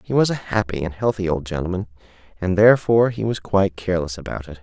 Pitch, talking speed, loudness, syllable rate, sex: 95 Hz, 210 wpm, -20 LUFS, 6.8 syllables/s, male